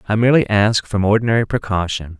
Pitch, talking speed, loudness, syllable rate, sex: 105 Hz, 165 wpm, -17 LUFS, 6.5 syllables/s, male